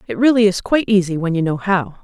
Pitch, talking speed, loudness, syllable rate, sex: 190 Hz, 265 wpm, -16 LUFS, 6.6 syllables/s, female